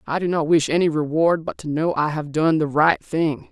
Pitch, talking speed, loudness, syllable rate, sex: 155 Hz, 255 wpm, -20 LUFS, 5.1 syllables/s, male